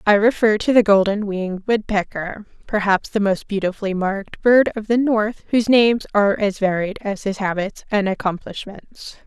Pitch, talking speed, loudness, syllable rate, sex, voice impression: 205 Hz, 170 wpm, -19 LUFS, 5.1 syllables/s, female, feminine, adult-like, tensed, powerful, bright, clear, fluent, slightly raspy, intellectual, friendly, lively, slightly sharp